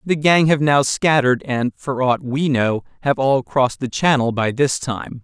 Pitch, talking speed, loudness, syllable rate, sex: 135 Hz, 205 wpm, -18 LUFS, 4.5 syllables/s, male